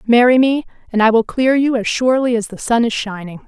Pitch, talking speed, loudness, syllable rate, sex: 235 Hz, 240 wpm, -15 LUFS, 5.8 syllables/s, female